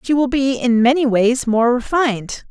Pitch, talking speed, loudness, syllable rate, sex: 250 Hz, 190 wpm, -16 LUFS, 4.8 syllables/s, female